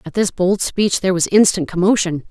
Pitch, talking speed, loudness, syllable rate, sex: 185 Hz, 210 wpm, -16 LUFS, 5.6 syllables/s, female